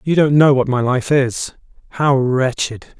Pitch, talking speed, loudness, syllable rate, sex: 135 Hz, 160 wpm, -16 LUFS, 4.0 syllables/s, male